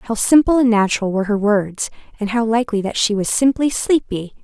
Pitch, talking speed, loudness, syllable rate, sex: 220 Hz, 205 wpm, -17 LUFS, 5.7 syllables/s, female